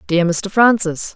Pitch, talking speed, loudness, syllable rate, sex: 190 Hz, 155 wpm, -15 LUFS, 4.0 syllables/s, female